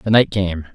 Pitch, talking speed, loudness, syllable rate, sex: 100 Hz, 240 wpm, -18 LUFS, 4.9 syllables/s, male